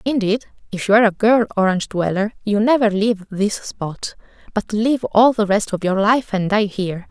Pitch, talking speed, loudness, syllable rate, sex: 210 Hz, 205 wpm, -18 LUFS, 5.1 syllables/s, female